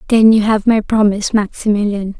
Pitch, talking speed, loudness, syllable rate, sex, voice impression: 210 Hz, 165 wpm, -14 LUFS, 5.6 syllables/s, female, feminine, very young, weak, raspy, slightly cute, kind, modest, light